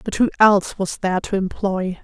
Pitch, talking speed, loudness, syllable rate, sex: 195 Hz, 205 wpm, -19 LUFS, 5.5 syllables/s, female